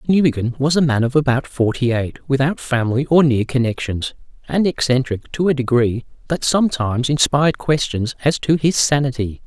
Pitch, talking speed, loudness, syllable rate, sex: 135 Hz, 165 wpm, -18 LUFS, 5.4 syllables/s, male